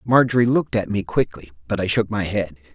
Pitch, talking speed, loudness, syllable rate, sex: 105 Hz, 220 wpm, -21 LUFS, 6.0 syllables/s, male